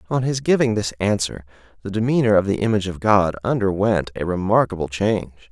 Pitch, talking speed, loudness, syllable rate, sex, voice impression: 100 Hz, 175 wpm, -20 LUFS, 6.0 syllables/s, male, masculine, middle-aged, powerful, hard, slightly halting, raspy, mature, slightly friendly, wild, lively, strict, intense